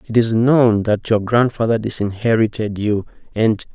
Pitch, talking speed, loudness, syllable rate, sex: 110 Hz, 145 wpm, -17 LUFS, 4.7 syllables/s, male